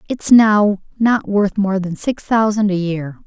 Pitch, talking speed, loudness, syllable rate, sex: 200 Hz, 200 wpm, -16 LUFS, 4.2 syllables/s, female